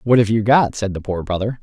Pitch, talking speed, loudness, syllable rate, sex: 105 Hz, 295 wpm, -18 LUFS, 5.9 syllables/s, male